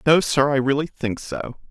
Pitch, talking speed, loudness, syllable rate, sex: 140 Hz, 210 wpm, -21 LUFS, 4.6 syllables/s, male